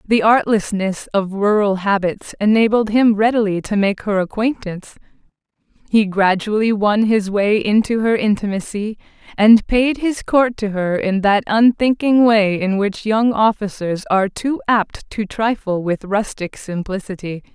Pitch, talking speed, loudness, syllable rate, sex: 210 Hz, 145 wpm, -17 LUFS, 4.3 syllables/s, female